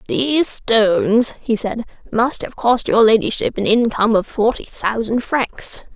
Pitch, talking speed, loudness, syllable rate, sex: 225 Hz, 150 wpm, -17 LUFS, 4.3 syllables/s, female